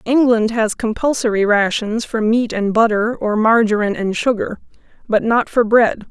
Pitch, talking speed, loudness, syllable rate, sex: 220 Hz, 155 wpm, -16 LUFS, 4.7 syllables/s, female